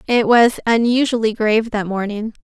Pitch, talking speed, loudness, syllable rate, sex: 225 Hz, 150 wpm, -16 LUFS, 5.1 syllables/s, female